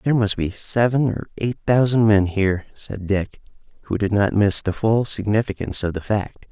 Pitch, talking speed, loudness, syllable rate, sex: 105 Hz, 195 wpm, -20 LUFS, 5.0 syllables/s, male